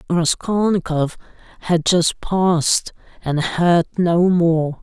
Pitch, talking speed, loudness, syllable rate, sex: 170 Hz, 100 wpm, -18 LUFS, 3.2 syllables/s, male